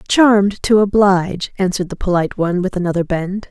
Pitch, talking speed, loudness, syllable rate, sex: 190 Hz, 170 wpm, -16 LUFS, 6.1 syllables/s, female